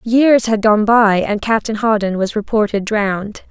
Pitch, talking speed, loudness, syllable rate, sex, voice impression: 215 Hz, 170 wpm, -15 LUFS, 4.5 syllables/s, female, feminine, slightly adult-like, slightly cute, refreshing, friendly